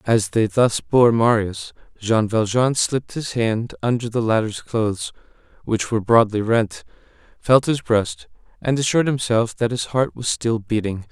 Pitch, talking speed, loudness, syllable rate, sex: 115 Hz, 160 wpm, -20 LUFS, 4.5 syllables/s, male